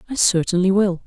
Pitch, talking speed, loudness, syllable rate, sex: 195 Hz, 170 wpm, -18 LUFS, 5.8 syllables/s, female